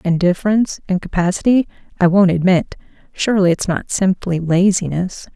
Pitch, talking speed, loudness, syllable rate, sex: 185 Hz, 100 wpm, -16 LUFS, 5.3 syllables/s, female